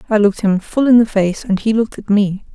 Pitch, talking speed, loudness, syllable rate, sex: 210 Hz, 285 wpm, -15 LUFS, 6.1 syllables/s, female